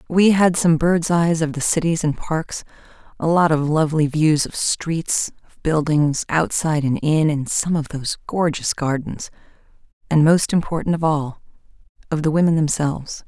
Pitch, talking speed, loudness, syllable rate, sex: 160 Hz, 165 wpm, -19 LUFS, 4.7 syllables/s, female